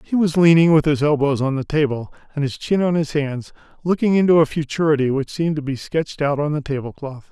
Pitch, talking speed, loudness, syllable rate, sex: 150 Hz, 230 wpm, -19 LUFS, 6.0 syllables/s, male